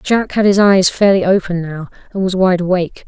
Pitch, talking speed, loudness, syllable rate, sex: 185 Hz, 215 wpm, -14 LUFS, 5.7 syllables/s, female